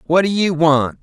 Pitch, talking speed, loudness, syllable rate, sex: 165 Hz, 235 wpm, -15 LUFS, 4.6 syllables/s, male